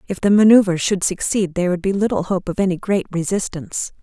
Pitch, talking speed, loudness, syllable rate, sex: 190 Hz, 210 wpm, -18 LUFS, 6.1 syllables/s, female